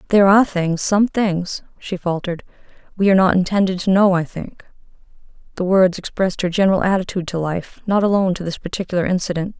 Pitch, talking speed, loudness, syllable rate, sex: 185 Hz, 175 wpm, -18 LUFS, 6.4 syllables/s, female